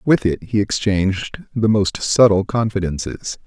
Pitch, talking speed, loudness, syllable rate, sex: 105 Hz, 140 wpm, -18 LUFS, 4.4 syllables/s, male